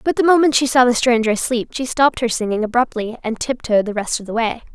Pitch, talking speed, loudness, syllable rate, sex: 240 Hz, 255 wpm, -17 LUFS, 6.3 syllables/s, female